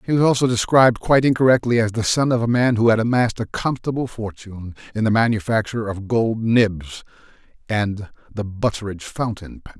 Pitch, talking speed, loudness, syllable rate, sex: 110 Hz, 180 wpm, -19 LUFS, 5.9 syllables/s, male